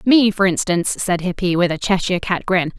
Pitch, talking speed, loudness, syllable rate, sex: 185 Hz, 215 wpm, -18 LUFS, 5.8 syllables/s, female